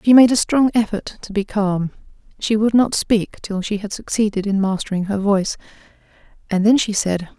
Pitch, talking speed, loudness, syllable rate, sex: 205 Hz, 195 wpm, -19 LUFS, 5.2 syllables/s, female